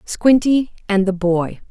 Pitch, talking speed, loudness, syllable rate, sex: 205 Hz, 140 wpm, -17 LUFS, 3.7 syllables/s, female